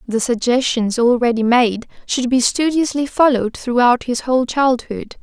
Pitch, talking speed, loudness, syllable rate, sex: 245 Hz, 140 wpm, -16 LUFS, 4.7 syllables/s, female